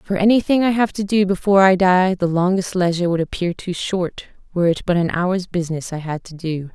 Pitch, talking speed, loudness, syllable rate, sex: 180 Hz, 230 wpm, -19 LUFS, 5.8 syllables/s, female